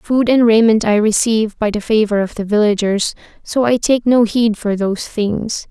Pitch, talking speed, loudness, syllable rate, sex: 220 Hz, 200 wpm, -15 LUFS, 4.8 syllables/s, female